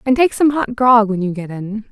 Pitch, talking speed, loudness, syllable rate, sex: 225 Hz, 285 wpm, -16 LUFS, 5.1 syllables/s, female